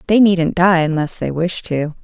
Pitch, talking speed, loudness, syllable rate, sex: 170 Hz, 205 wpm, -16 LUFS, 4.5 syllables/s, female